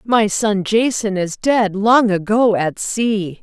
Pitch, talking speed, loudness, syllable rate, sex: 210 Hz, 160 wpm, -16 LUFS, 3.3 syllables/s, female